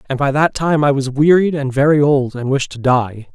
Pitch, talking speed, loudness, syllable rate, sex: 140 Hz, 250 wpm, -15 LUFS, 5.1 syllables/s, male